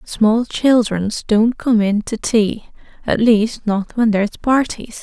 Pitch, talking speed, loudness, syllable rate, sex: 220 Hz, 155 wpm, -16 LUFS, 3.5 syllables/s, female